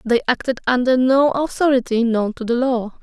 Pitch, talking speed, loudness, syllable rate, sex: 250 Hz, 180 wpm, -18 LUFS, 5.1 syllables/s, female